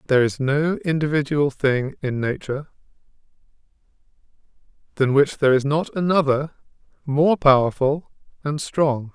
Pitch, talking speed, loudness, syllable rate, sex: 145 Hz, 110 wpm, -21 LUFS, 4.9 syllables/s, male